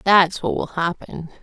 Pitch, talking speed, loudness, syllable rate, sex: 180 Hz, 170 wpm, -20 LUFS, 4.2 syllables/s, female